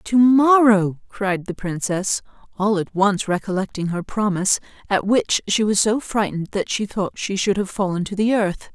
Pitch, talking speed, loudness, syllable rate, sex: 200 Hz, 185 wpm, -20 LUFS, 4.7 syllables/s, female